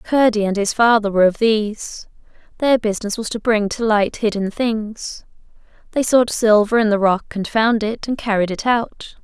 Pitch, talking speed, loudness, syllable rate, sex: 220 Hz, 190 wpm, -18 LUFS, 4.8 syllables/s, female